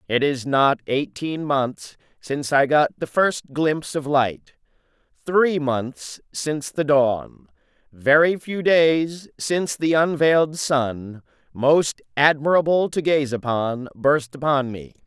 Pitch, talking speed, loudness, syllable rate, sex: 145 Hz, 130 wpm, -21 LUFS, 3.6 syllables/s, male